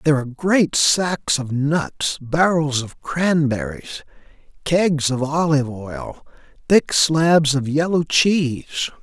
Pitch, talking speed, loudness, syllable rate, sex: 150 Hz, 120 wpm, -19 LUFS, 3.7 syllables/s, male